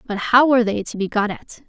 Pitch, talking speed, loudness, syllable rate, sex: 225 Hz, 285 wpm, -18 LUFS, 5.8 syllables/s, female